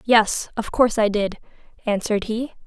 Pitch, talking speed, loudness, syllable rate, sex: 220 Hz, 160 wpm, -22 LUFS, 5.3 syllables/s, female